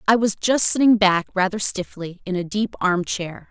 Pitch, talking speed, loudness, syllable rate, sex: 195 Hz, 205 wpm, -20 LUFS, 4.8 syllables/s, female